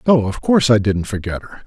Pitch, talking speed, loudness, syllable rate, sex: 115 Hz, 250 wpm, -17 LUFS, 5.9 syllables/s, male